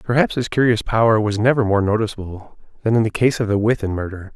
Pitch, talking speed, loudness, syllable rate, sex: 110 Hz, 220 wpm, -18 LUFS, 6.3 syllables/s, male